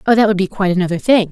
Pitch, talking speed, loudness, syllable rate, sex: 195 Hz, 320 wpm, -15 LUFS, 8.6 syllables/s, female